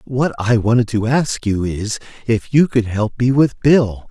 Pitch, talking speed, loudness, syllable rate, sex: 115 Hz, 205 wpm, -17 LUFS, 4.1 syllables/s, male